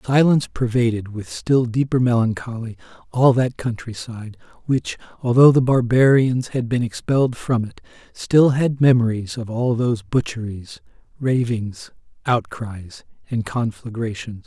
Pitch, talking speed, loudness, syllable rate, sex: 120 Hz, 120 wpm, -20 LUFS, 4.5 syllables/s, male